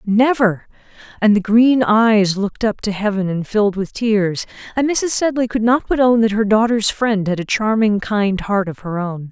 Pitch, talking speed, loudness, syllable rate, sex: 215 Hz, 205 wpm, -17 LUFS, 4.7 syllables/s, female